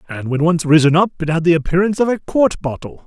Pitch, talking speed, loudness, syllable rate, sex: 170 Hz, 255 wpm, -16 LUFS, 6.4 syllables/s, male